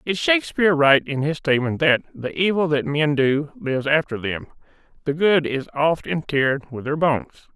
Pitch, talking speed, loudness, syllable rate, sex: 150 Hz, 185 wpm, -20 LUFS, 5.2 syllables/s, male